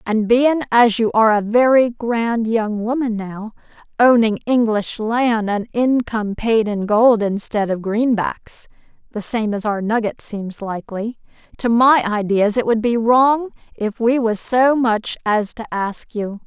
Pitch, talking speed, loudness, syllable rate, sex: 225 Hz, 155 wpm, -18 LUFS, 4.0 syllables/s, female